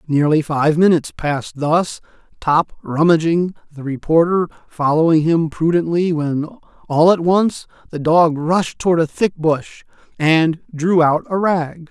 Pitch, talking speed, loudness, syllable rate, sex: 160 Hz, 140 wpm, -17 LUFS, 4.2 syllables/s, male